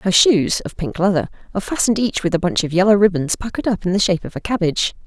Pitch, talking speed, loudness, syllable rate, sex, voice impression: 195 Hz, 235 wpm, -18 LUFS, 7.1 syllables/s, female, very feminine, very adult-like, slightly thin, slightly tensed, slightly powerful, bright, hard, very clear, very fluent, cool, very intellectual, very refreshing, slightly sincere, slightly calm, slightly friendly, slightly reassuring, unique, slightly elegant, wild, sweet, very lively, strict, very intense